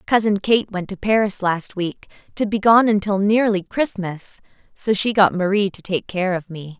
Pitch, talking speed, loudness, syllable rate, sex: 200 Hz, 195 wpm, -19 LUFS, 4.6 syllables/s, female